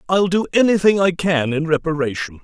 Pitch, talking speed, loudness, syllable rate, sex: 165 Hz, 175 wpm, -17 LUFS, 5.5 syllables/s, male